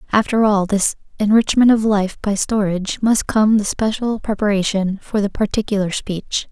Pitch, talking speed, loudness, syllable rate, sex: 205 Hz, 155 wpm, -18 LUFS, 4.9 syllables/s, female